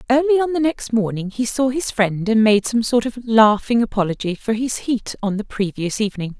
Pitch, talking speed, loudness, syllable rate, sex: 225 Hz, 215 wpm, -19 LUFS, 5.4 syllables/s, female